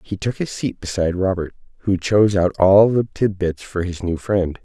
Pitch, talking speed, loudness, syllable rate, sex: 95 Hz, 205 wpm, -19 LUFS, 5.1 syllables/s, male